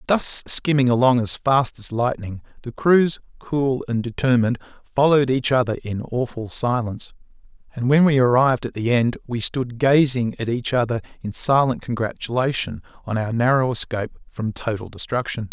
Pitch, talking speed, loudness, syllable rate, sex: 125 Hz, 160 wpm, -20 LUFS, 5.1 syllables/s, male